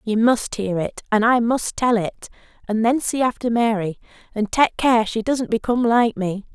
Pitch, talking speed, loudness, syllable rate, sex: 225 Hz, 210 wpm, -20 LUFS, 5.0 syllables/s, female